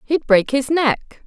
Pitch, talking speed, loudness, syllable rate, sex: 265 Hz, 190 wpm, -17 LUFS, 3.5 syllables/s, female